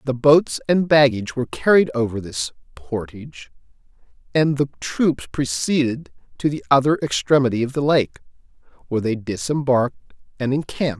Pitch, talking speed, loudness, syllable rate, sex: 130 Hz, 135 wpm, -20 LUFS, 5.2 syllables/s, male